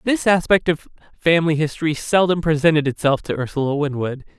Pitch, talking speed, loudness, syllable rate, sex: 155 Hz, 150 wpm, -19 LUFS, 6.0 syllables/s, male